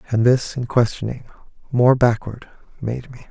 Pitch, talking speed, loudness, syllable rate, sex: 120 Hz, 145 wpm, -20 LUFS, 4.7 syllables/s, male